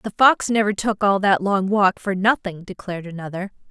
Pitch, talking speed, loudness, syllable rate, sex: 195 Hz, 195 wpm, -20 LUFS, 5.1 syllables/s, female